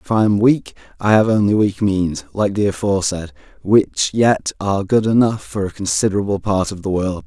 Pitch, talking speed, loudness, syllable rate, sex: 100 Hz, 200 wpm, -17 LUFS, 5.3 syllables/s, male